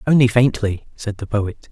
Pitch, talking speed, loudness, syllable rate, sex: 110 Hz, 175 wpm, -19 LUFS, 4.8 syllables/s, male